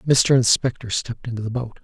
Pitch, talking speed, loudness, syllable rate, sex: 120 Hz, 195 wpm, -20 LUFS, 5.6 syllables/s, male